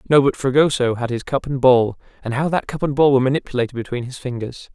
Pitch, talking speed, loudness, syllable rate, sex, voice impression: 130 Hz, 240 wpm, -19 LUFS, 6.5 syllables/s, male, masculine, adult-like, slightly soft, fluent, refreshing, sincere